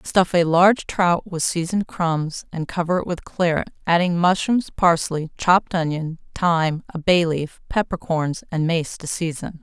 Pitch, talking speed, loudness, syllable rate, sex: 170 Hz, 170 wpm, -21 LUFS, 4.5 syllables/s, female